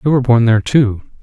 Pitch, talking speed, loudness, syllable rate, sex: 120 Hz, 245 wpm, -13 LUFS, 7.3 syllables/s, male